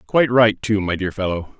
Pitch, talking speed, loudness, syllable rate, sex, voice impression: 105 Hz, 225 wpm, -18 LUFS, 5.6 syllables/s, male, masculine, adult-like, slightly thick, fluent, refreshing, slightly sincere, slightly lively